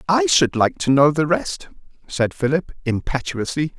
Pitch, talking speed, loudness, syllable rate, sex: 140 Hz, 160 wpm, -19 LUFS, 4.4 syllables/s, male